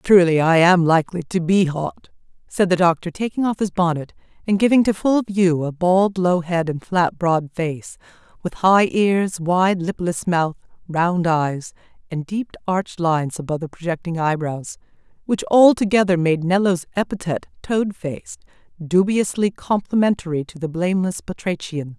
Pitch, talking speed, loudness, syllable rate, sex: 175 Hz, 155 wpm, -19 LUFS, 4.7 syllables/s, female